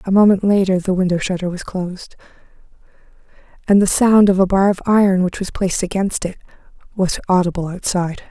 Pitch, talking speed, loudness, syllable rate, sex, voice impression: 190 Hz, 175 wpm, -17 LUFS, 6.1 syllables/s, female, very feminine, slightly young, slightly adult-like, very thin, very relaxed, very weak, very dark, soft, slightly muffled, very fluent, very cute, intellectual, refreshing, very sincere, very calm, very friendly, very reassuring, very unique, very elegant, very sweet, very kind, very modest